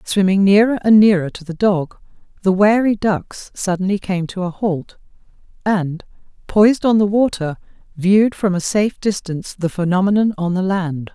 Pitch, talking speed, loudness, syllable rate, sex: 195 Hz, 160 wpm, -17 LUFS, 5.0 syllables/s, female